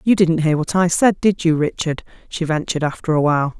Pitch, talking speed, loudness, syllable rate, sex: 165 Hz, 235 wpm, -18 LUFS, 5.9 syllables/s, female